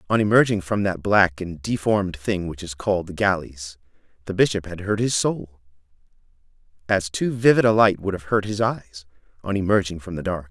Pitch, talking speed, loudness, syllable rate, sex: 95 Hz, 195 wpm, -22 LUFS, 5.4 syllables/s, male